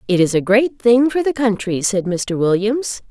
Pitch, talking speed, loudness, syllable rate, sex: 220 Hz, 210 wpm, -17 LUFS, 4.5 syllables/s, female